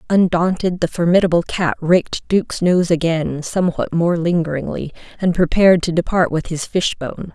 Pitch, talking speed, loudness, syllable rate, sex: 170 Hz, 145 wpm, -17 LUFS, 5.3 syllables/s, female